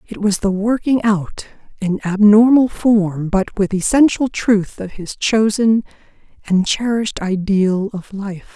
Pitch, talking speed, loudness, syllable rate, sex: 205 Hz, 140 wpm, -16 LUFS, 4.0 syllables/s, female